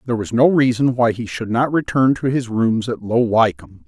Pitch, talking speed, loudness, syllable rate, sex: 120 Hz, 230 wpm, -18 LUFS, 5.4 syllables/s, male